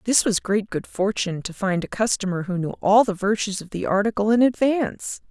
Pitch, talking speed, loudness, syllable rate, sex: 205 Hz, 215 wpm, -22 LUFS, 5.5 syllables/s, female